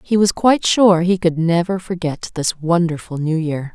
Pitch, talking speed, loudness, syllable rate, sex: 175 Hz, 190 wpm, -17 LUFS, 4.7 syllables/s, female